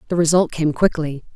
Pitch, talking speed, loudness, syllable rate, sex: 160 Hz, 175 wpm, -19 LUFS, 5.7 syllables/s, female